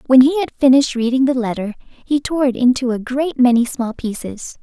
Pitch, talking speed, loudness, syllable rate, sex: 255 Hz, 210 wpm, -16 LUFS, 5.3 syllables/s, female